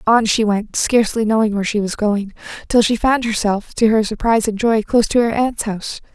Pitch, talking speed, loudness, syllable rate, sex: 220 Hz, 225 wpm, -17 LUFS, 5.8 syllables/s, female